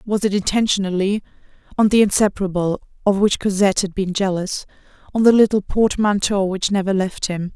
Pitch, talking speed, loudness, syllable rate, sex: 195 Hz, 160 wpm, -18 LUFS, 5.6 syllables/s, female